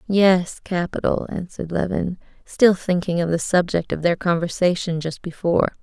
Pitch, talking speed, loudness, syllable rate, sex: 175 Hz, 145 wpm, -21 LUFS, 5.0 syllables/s, female